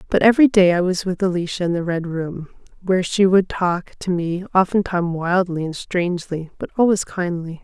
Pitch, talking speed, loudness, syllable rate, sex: 180 Hz, 190 wpm, -19 LUFS, 5.4 syllables/s, female